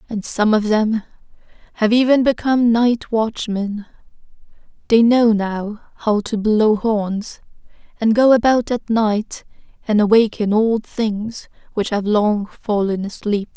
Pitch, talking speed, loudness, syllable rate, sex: 220 Hz, 135 wpm, -17 LUFS, 3.8 syllables/s, female